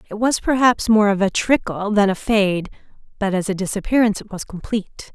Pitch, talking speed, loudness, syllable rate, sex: 205 Hz, 200 wpm, -19 LUFS, 5.6 syllables/s, female